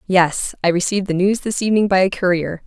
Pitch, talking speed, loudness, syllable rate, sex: 190 Hz, 225 wpm, -18 LUFS, 6.1 syllables/s, female